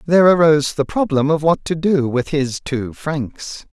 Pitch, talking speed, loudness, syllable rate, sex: 150 Hz, 190 wpm, -17 LUFS, 4.6 syllables/s, male